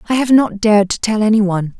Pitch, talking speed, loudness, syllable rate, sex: 215 Hz, 235 wpm, -14 LUFS, 6.2 syllables/s, female